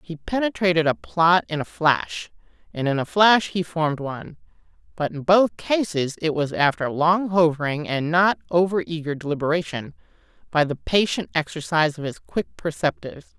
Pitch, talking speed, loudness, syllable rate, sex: 165 Hz, 160 wpm, -22 LUFS, 5.1 syllables/s, female